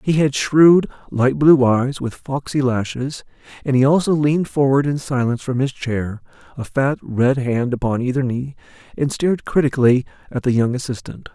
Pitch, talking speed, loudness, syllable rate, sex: 130 Hz, 175 wpm, -18 LUFS, 5.0 syllables/s, male